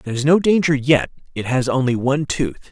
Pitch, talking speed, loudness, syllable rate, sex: 140 Hz, 220 wpm, -18 LUFS, 5.8 syllables/s, male